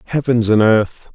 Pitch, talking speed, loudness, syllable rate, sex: 115 Hz, 160 wpm, -14 LUFS, 4.3 syllables/s, male